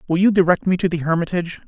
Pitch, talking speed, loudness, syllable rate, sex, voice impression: 175 Hz, 250 wpm, -18 LUFS, 7.5 syllables/s, male, masculine, slightly adult-like, fluent, slightly cool, refreshing, slightly friendly